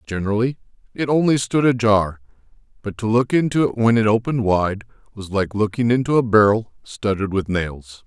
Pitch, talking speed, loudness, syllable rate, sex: 110 Hz, 170 wpm, -19 LUFS, 5.4 syllables/s, male